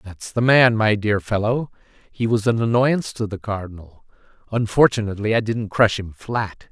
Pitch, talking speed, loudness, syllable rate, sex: 110 Hz, 170 wpm, -20 LUFS, 5.0 syllables/s, male